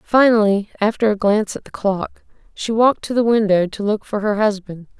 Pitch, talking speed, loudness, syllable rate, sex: 210 Hz, 205 wpm, -18 LUFS, 5.5 syllables/s, female